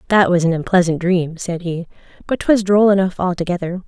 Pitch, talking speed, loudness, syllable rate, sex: 180 Hz, 185 wpm, -17 LUFS, 5.5 syllables/s, female